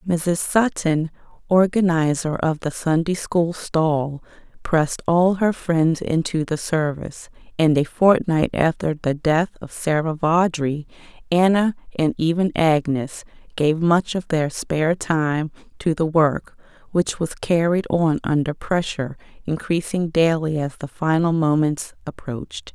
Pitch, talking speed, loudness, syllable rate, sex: 160 Hz, 130 wpm, -21 LUFS, 4.0 syllables/s, female